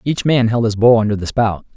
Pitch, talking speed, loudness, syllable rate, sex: 115 Hz, 275 wpm, -15 LUFS, 5.7 syllables/s, male